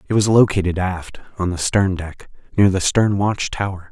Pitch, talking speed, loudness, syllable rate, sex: 95 Hz, 200 wpm, -18 LUFS, 4.9 syllables/s, male